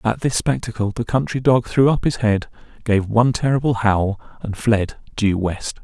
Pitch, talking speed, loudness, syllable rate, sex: 115 Hz, 185 wpm, -19 LUFS, 4.9 syllables/s, male